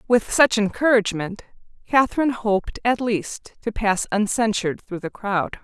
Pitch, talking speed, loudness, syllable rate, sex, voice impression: 215 Hz, 140 wpm, -21 LUFS, 4.9 syllables/s, female, feminine, adult-like, tensed, powerful, bright, clear, fluent, intellectual, friendly, lively, slightly strict, intense, sharp